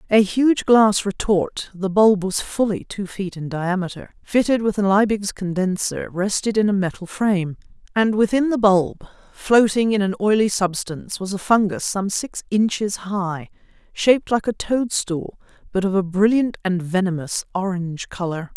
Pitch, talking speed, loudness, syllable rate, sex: 200 Hz, 160 wpm, -20 LUFS, 4.1 syllables/s, female